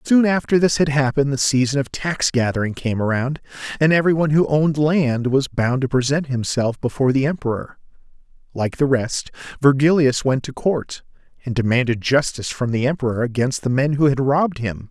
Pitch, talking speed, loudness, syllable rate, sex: 135 Hz, 180 wpm, -19 LUFS, 5.5 syllables/s, male